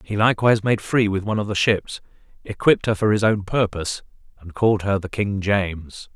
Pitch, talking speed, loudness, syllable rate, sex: 100 Hz, 205 wpm, -20 LUFS, 5.9 syllables/s, male